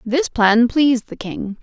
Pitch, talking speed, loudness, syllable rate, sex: 240 Hz, 185 wpm, -17 LUFS, 4.0 syllables/s, female